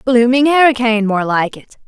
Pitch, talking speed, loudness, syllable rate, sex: 235 Hz, 160 wpm, -13 LUFS, 5.2 syllables/s, female